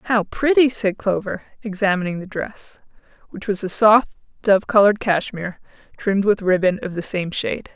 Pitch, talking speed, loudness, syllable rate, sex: 200 Hz, 160 wpm, -19 LUFS, 5.3 syllables/s, female